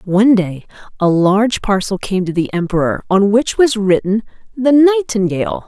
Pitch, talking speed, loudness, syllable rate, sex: 210 Hz, 160 wpm, -14 LUFS, 4.9 syllables/s, female